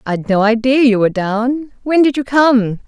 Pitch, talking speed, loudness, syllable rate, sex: 240 Hz, 210 wpm, -14 LUFS, 4.7 syllables/s, female